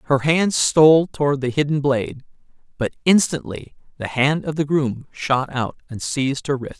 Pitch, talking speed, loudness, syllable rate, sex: 140 Hz, 175 wpm, -19 LUFS, 4.9 syllables/s, male